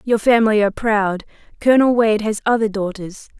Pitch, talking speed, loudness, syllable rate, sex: 215 Hz, 160 wpm, -17 LUFS, 5.8 syllables/s, female